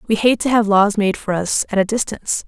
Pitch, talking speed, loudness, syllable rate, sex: 210 Hz, 265 wpm, -17 LUFS, 5.8 syllables/s, female